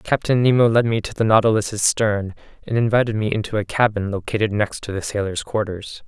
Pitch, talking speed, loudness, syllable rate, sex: 110 Hz, 200 wpm, -20 LUFS, 5.6 syllables/s, male